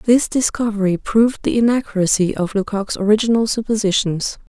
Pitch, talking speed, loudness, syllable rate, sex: 215 Hz, 120 wpm, -18 LUFS, 5.7 syllables/s, female